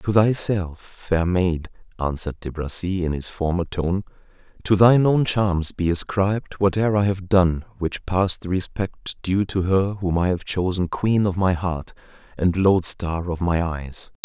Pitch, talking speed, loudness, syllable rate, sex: 90 Hz, 170 wpm, -22 LUFS, 4.5 syllables/s, male